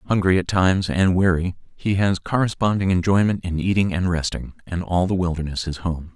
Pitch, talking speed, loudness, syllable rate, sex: 90 Hz, 185 wpm, -21 LUFS, 5.3 syllables/s, male